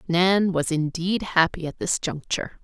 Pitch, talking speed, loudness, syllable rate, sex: 170 Hz, 160 wpm, -23 LUFS, 4.5 syllables/s, female